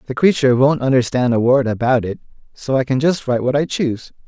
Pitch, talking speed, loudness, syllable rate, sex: 130 Hz, 225 wpm, -16 LUFS, 6.3 syllables/s, male